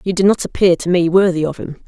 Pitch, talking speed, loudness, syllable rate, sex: 180 Hz, 290 wpm, -15 LUFS, 6.3 syllables/s, female